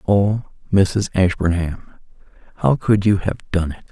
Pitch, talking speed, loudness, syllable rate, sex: 95 Hz, 140 wpm, -19 LUFS, 4.4 syllables/s, male